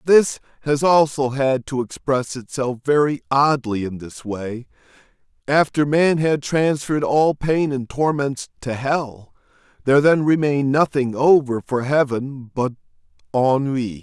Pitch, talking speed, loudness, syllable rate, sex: 135 Hz, 135 wpm, -19 LUFS, 4.1 syllables/s, male